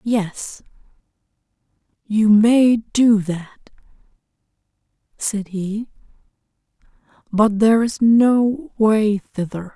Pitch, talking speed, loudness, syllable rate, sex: 215 Hz, 80 wpm, -17 LUFS, 2.8 syllables/s, female